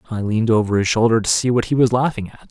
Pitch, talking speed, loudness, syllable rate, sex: 115 Hz, 290 wpm, -17 LUFS, 7.0 syllables/s, male